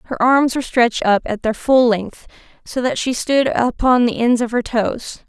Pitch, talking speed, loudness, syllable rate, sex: 240 Hz, 215 wpm, -17 LUFS, 4.7 syllables/s, female